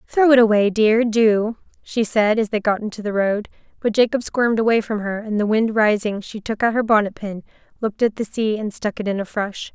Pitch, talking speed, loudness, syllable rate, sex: 215 Hz, 235 wpm, -19 LUFS, 5.4 syllables/s, female